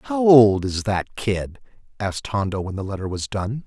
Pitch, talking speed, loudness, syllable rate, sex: 110 Hz, 195 wpm, -21 LUFS, 4.7 syllables/s, male